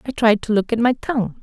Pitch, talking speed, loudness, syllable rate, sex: 225 Hz, 295 wpm, -19 LUFS, 6.2 syllables/s, female